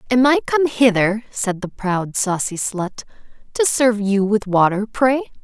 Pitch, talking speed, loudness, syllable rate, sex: 220 Hz, 165 wpm, -18 LUFS, 4.3 syllables/s, female